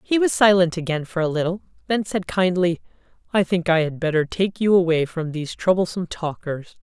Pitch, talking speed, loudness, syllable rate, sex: 175 Hz, 190 wpm, -21 LUFS, 5.6 syllables/s, female